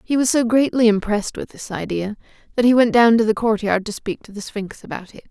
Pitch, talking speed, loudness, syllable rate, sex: 220 Hz, 260 wpm, -19 LUFS, 5.9 syllables/s, female